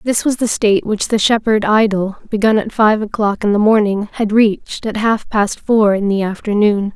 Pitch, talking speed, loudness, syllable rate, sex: 210 Hz, 205 wpm, -15 LUFS, 5.1 syllables/s, female